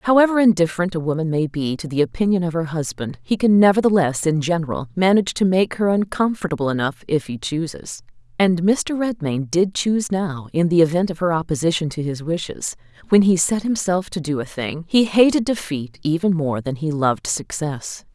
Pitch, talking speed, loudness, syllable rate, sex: 170 Hz, 190 wpm, -20 LUFS, 5.4 syllables/s, female